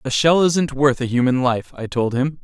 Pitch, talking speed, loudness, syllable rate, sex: 135 Hz, 245 wpm, -18 LUFS, 4.8 syllables/s, male